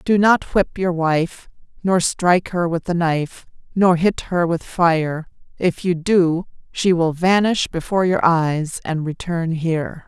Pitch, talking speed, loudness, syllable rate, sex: 170 Hz, 165 wpm, -19 LUFS, 4.0 syllables/s, female